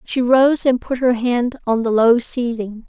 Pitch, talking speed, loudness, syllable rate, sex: 240 Hz, 210 wpm, -17 LUFS, 4.1 syllables/s, female